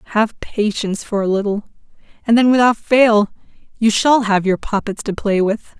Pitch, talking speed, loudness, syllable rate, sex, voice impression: 215 Hz, 175 wpm, -16 LUFS, 5.0 syllables/s, female, feminine, adult-like, tensed, clear, fluent, intellectual, slightly calm, elegant, lively, slightly strict, slightly sharp